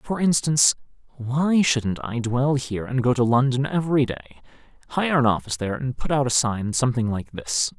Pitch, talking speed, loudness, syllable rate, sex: 125 Hz, 195 wpm, -22 LUFS, 5.6 syllables/s, male